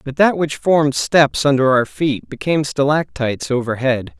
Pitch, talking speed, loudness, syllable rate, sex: 135 Hz, 160 wpm, -17 LUFS, 4.9 syllables/s, male